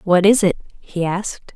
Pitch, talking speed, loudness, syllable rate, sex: 190 Hz, 195 wpm, -17 LUFS, 4.7 syllables/s, female